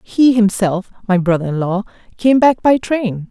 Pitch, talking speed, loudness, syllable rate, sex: 210 Hz, 145 wpm, -15 LUFS, 4.4 syllables/s, female